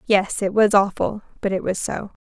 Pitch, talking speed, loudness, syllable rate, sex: 200 Hz, 215 wpm, -21 LUFS, 5.0 syllables/s, female